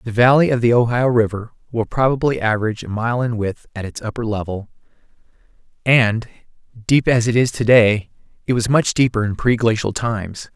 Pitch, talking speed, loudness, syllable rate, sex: 115 Hz, 175 wpm, -18 LUFS, 5.5 syllables/s, male